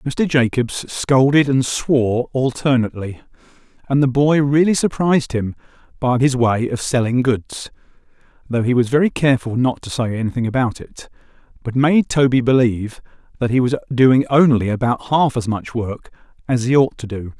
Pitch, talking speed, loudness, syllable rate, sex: 125 Hz, 165 wpm, -17 LUFS, 5.0 syllables/s, male